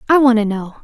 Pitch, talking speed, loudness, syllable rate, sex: 235 Hz, 290 wpm, -14 LUFS, 6.8 syllables/s, female